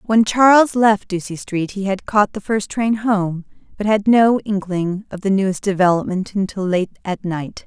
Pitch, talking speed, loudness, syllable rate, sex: 200 Hz, 190 wpm, -18 LUFS, 4.5 syllables/s, female